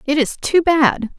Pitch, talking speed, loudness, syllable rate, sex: 290 Hz, 205 wpm, -16 LUFS, 4.0 syllables/s, female